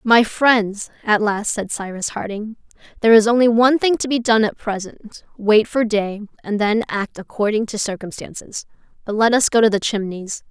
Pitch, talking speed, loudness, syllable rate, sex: 215 Hz, 190 wpm, -18 LUFS, 5.0 syllables/s, female